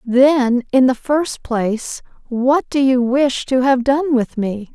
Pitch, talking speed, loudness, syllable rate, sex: 260 Hz, 175 wpm, -16 LUFS, 3.5 syllables/s, female